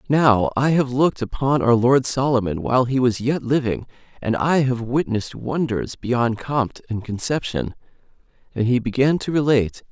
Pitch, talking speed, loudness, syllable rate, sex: 125 Hz, 165 wpm, -20 LUFS, 4.9 syllables/s, male